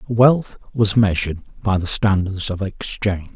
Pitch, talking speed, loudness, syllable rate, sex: 100 Hz, 145 wpm, -19 LUFS, 4.6 syllables/s, male